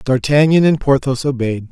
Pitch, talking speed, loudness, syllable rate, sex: 135 Hz, 140 wpm, -14 LUFS, 5.0 syllables/s, male